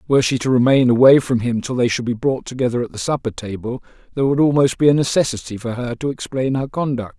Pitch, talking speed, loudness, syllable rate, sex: 125 Hz, 240 wpm, -18 LUFS, 6.5 syllables/s, male